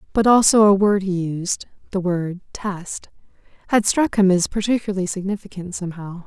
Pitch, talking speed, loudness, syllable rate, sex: 190 Hz, 155 wpm, -20 LUFS, 5.2 syllables/s, female